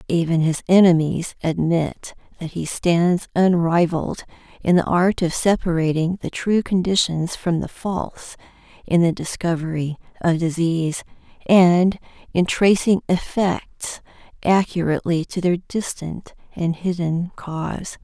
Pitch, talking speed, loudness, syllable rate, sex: 175 Hz, 115 wpm, -20 LUFS, 4.2 syllables/s, female